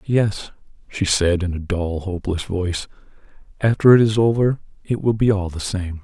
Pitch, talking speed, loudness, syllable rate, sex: 100 Hz, 180 wpm, -20 LUFS, 5.0 syllables/s, male